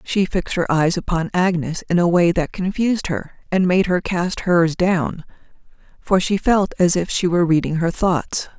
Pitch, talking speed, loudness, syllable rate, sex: 175 Hz, 195 wpm, -19 LUFS, 4.8 syllables/s, female